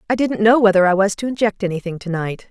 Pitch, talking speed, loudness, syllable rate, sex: 200 Hz, 265 wpm, -17 LUFS, 6.4 syllables/s, female